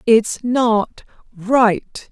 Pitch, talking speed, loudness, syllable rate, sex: 225 Hz, 85 wpm, -17 LUFS, 1.9 syllables/s, female